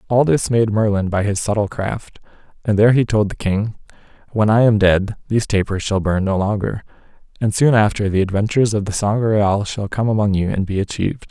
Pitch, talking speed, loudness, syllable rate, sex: 105 Hz, 205 wpm, -18 LUFS, 5.7 syllables/s, male